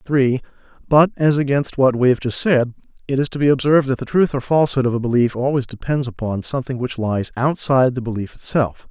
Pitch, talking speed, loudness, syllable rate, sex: 130 Hz, 215 wpm, -18 LUFS, 6.2 syllables/s, male